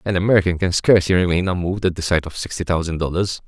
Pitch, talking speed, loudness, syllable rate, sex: 90 Hz, 225 wpm, -19 LUFS, 7.2 syllables/s, male